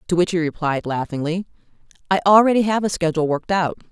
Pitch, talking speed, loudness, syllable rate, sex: 175 Hz, 185 wpm, -19 LUFS, 6.6 syllables/s, female